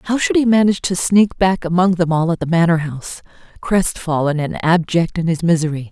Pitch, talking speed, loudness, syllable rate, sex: 170 Hz, 205 wpm, -16 LUFS, 5.5 syllables/s, female